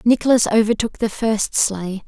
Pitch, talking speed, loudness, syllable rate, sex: 215 Hz, 145 wpm, -18 LUFS, 4.7 syllables/s, female